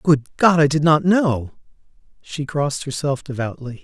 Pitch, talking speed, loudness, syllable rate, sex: 145 Hz, 155 wpm, -19 LUFS, 4.6 syllables/s, male